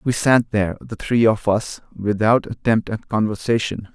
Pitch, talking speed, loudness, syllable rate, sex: 110 Hz, 165 wpm, -19 LUFS, 4.6 syllables/s, male